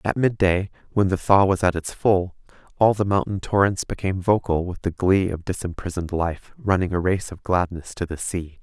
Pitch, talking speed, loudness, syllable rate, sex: 90 Hz, 200 wpm, -22 LUFS, 5.3 syllables/s, male